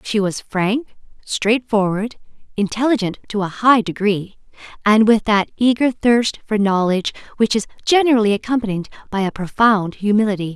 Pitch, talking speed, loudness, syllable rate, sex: 215 Hz, 135 wpm, -18 LUFS, 5.0 syllables/s, female